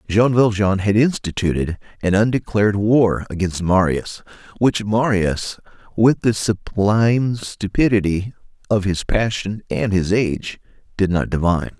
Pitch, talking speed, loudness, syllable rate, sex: 105 Hz, 120 wpm, -19 LUFS, 4.4 syllables/s, male